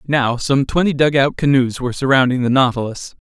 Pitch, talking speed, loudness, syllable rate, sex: 135 Hz, 165 wpm, -16 LUFS, 5.5 syllables/s, male